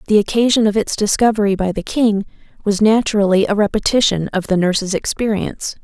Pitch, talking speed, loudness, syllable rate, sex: 205 Hz, 165 wpm, -16 LUFS, 6.0 syllables/s, female